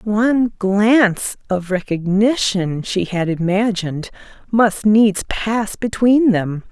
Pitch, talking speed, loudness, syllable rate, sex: 205 Hz, 105 wpm, -17 LUFS, 3.4 syllables/s, female